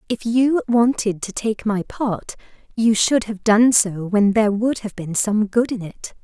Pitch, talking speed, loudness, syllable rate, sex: 215 Hz, 200 wpm, -19 LUFS, 4.2 syllables/s, female